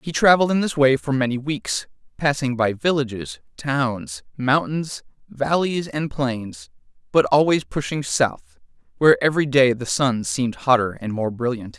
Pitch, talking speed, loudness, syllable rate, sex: 135 Hz, 155 wpm, -21 LUFS, 4.6 syllables/s, male